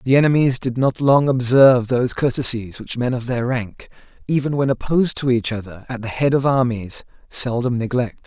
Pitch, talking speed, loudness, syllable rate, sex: 125 Hz, 190 wpm, -19 LUFS, 5.4 syllables/s, male